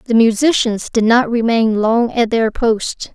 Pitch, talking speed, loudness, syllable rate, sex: 230 Hz, 170 wpm, -15 LUFS, 4.1 syllables/s, female